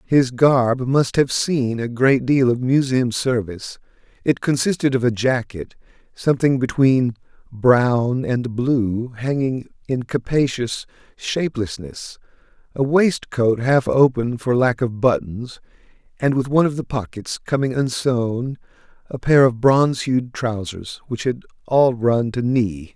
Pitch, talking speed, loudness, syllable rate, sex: 125 Hz, 140 wpm, -19 LUFS, 4.0 syllables/s, male